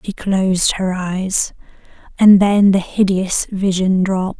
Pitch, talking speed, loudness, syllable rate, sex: 190 Hz, 150 wpm, -15 LUFS, 5.7 syllables/s, female